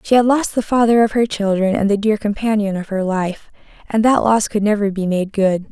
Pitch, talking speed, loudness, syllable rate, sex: 210 Hz, 240 wpm, -17 LUFS, 5.4 syllables/s, female